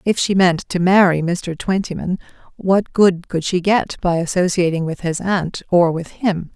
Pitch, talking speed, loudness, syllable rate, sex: 180 Hz, 185 wpm, -18 LUFS, 4.4 syllables/s, female